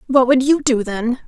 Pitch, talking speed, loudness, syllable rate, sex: 250 Hz, 235 wpm, -16 LUFS, 4.6 syllables/s, female